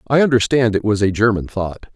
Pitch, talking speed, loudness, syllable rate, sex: 110 Hz, 215 wpm, -17 LUFS, 5.6 syllables/s, male